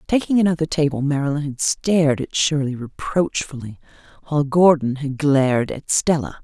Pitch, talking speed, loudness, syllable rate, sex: 145 Hz, 140 wpm, -19 LUFS, 5.3 syllables/s, female